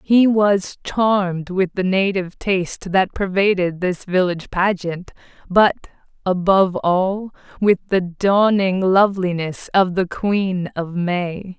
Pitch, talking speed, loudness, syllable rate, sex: 190 Hz, 125 wpm, -19 LUFS, 3.9 syllables/s, female